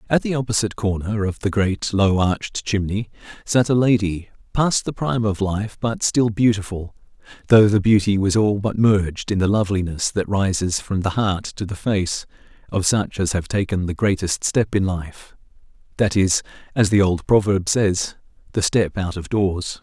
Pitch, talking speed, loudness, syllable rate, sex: 100 Hz, 180 wpm, -20 LUFS, 4.8 syllables/s, male